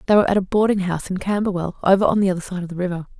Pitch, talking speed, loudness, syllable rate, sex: 190 Hz, 300 wpm, -20 LUFS, 8.4 syllables/s, female